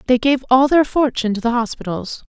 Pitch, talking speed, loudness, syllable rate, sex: 250 Hz, 210 wpm, -17 LUFS, 5.9 syllables/s, female